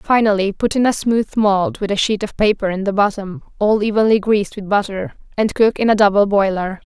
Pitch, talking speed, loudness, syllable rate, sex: 205 Hz, 215 wpm, -17 LUFS, 5.4 syllables/s, female